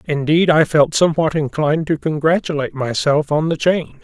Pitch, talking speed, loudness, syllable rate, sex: 155 Hz, 165 wpm, -17 LUFS, 5.7 syllables/s, male